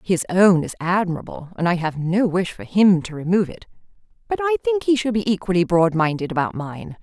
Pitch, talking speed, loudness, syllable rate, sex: 190 Hz, 215 wpm, -20 LUFS, 5.6 syllables/s, female